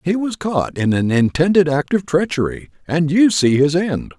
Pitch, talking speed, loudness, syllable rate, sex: 160 Hz, 200 wpm, -17 LUFS, 4.6 syllables/s, male